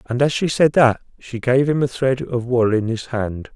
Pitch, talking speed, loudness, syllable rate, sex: 125 Hz, 255 wpm, -19 LUFS, 4.7 syllables/s, male